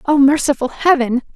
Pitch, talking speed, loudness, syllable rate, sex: 275 Hz, 135 wpm, -15 LUFS, 5.3 syllables/s, female